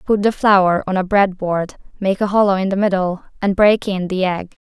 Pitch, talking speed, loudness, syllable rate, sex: 190 Hz, 230 wpm, -17 LUFS, 5.0 syllables/s, female